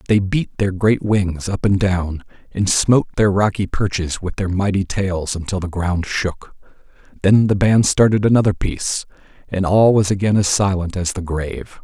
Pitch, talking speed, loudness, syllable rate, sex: 95 Hz, 180 wpm, -18 LUFS, 4.8 syllables/s, male